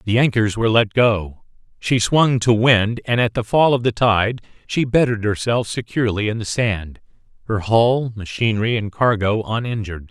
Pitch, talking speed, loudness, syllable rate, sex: 110 Hz, 170 wpm, -18 LUFS, 4.8 syllables/s, male